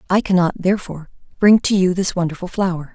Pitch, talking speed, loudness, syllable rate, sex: 185 Hz, 185 wpm, -17 LUFS, 6.5 syllables/s, female